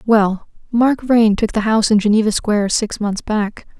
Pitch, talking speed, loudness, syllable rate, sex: 215 Hz, 190 wpm, -16 LUFS, 4.8 syllables/s, female